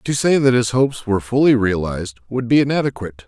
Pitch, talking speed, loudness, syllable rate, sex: 120 Hz, 200 wpm, -17 LUFS, 6.4 syllables/s, male